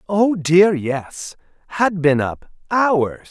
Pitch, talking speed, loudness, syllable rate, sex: 170 Hz, 90 wpm, -17 LUFS, 2.7 syllables/s, male